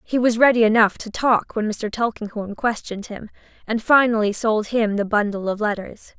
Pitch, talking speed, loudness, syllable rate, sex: 220 Hz, 185 wpm, -20 LUFS, 5.1 syllables/s, female